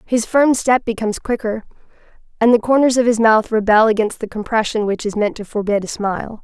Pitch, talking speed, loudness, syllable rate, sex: 220 Hz, 205 wpm, -17 LUFS, 5.7 syllables/s, female